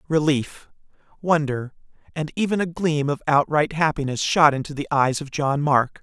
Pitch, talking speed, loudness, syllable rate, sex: 150 Hz, 160 wpm, -21 LUFS, 4.8 syllables/s, male